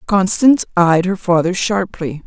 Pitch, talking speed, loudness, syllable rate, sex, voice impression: 185 Hz, 130 wpm, -15 LUFS, 4.5 syllables/s, female, feminine, very adult-like, intellectual, slightly sweet